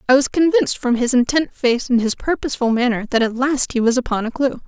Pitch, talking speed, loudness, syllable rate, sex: 255 Hz, 245 wpm, -18 LUFS, 6.1 syllables/s, female